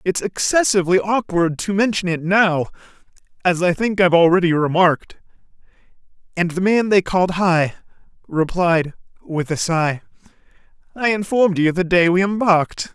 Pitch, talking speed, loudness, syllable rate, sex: 180 Hz, 140 wpm, -18 LUFS, 5.1 syllables/s, male